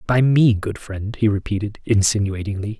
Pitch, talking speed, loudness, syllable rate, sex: 105 Hz, 150 wpm, -20 LUFS, 5.0 syllables/s, male